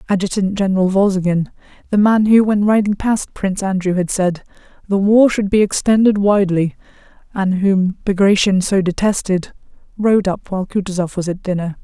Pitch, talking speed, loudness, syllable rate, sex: 195 Hz, 155 wpm, -16 LUFS, 5.4 syllables/s, female